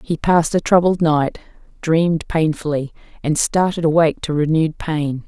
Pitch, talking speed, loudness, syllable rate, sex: 160 Hz, 150 wpm, -18 LUFS, 5.2 syllables/s, female